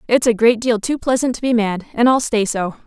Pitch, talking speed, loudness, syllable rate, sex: 230 Hz, 270 wpm, -17 LUFS, 5.5 syllables/s, female